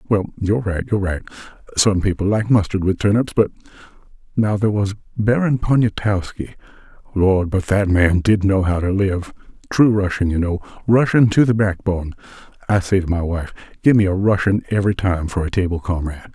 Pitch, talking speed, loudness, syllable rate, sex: 100 Hz, 175 wpm, -18 LUFS, 5.5 syllables/s, male